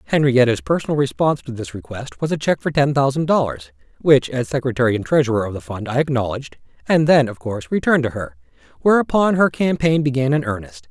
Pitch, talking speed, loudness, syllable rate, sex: 130 Hz, 200 wpm, -18 LUFS, 6.3 syllables/s, male